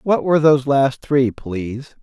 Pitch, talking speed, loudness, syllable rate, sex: 135 Hz, 180 wpm, -17 LUFS, 4.8 syllables/s, male